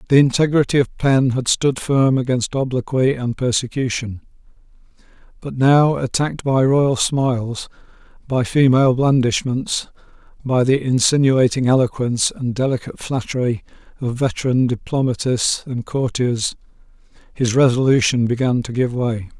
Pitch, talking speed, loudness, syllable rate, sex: 130 Hz, 120 wpm, -18 LUFS, 4.8 syllables/s, male